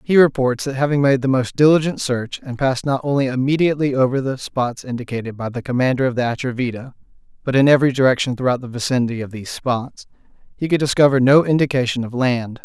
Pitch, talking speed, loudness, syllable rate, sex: 130 Hz, 195 wpm, -18 LUFS, 6.4 syllables/s, male